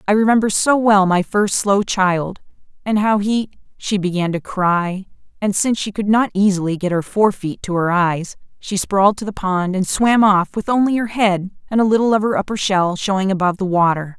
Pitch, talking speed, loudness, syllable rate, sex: 195 Hz, 205 wpm, -17 LUFS, 5.3 syllables/s, female